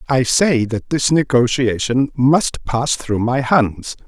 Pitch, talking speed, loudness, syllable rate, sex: 130 Hz, 145 wpm, -16 LUFS, 3.5 syllables/s, male